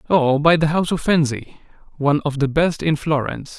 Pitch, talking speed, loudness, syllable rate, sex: 150 Hz, 200 wpm, -19 LUFS, 6.0 syllables/s, male